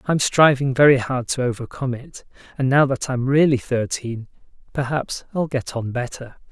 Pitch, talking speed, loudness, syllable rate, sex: 130 Hz, 165 wpm, -20 LUFS, 5.0 syllables/s, male